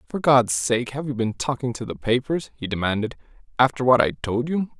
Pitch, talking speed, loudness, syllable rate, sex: 125 Hz, 215 wpm, -22 LUFS, 5.4 syllables/s, male